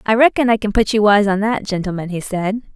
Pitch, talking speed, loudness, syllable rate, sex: 210 Hz, 260 wpm, -17 LUFS, 5.9 syllables/s, female